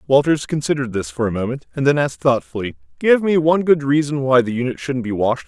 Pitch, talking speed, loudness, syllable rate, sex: 130 Hz, 240 wpm, -18 LUFS, 6.6 syllables/s, male